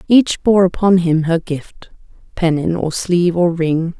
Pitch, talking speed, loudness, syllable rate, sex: 175 Hz, 150 wpm, -15 LUFS, 4.1 syllables/s, female